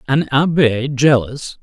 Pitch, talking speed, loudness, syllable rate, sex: 135 Hz, 110 wpm, -15 LUFS, 3.6 syllables/s, male